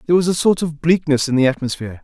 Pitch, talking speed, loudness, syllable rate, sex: 150 Hz, 265 wpm, -17 LUFS, 7.5 syllables/s, male